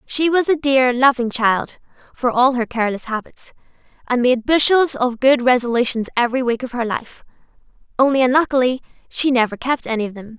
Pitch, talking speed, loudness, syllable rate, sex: 250 Hz, 175 wpm, -17 LUFS, 5.5 syllables/s, female